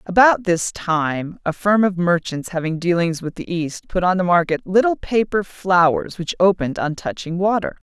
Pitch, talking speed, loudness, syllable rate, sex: 180 Hz, 180 wpm, -19 LUFS, 4.8 syllables/s, female